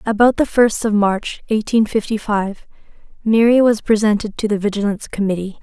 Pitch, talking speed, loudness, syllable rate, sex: 215 Hz, 160 wpm, -17 LUFS, 5.3 syllables/s, female